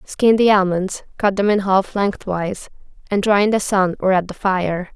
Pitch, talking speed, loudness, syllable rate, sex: 195 Hz, 205 wpm, -18 LUFS, 4.7 syllables/s, female